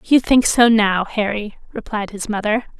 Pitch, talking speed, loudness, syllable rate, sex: 215 Hz, 170 wpm, -17 LUFS, 4.5 syllables/s, female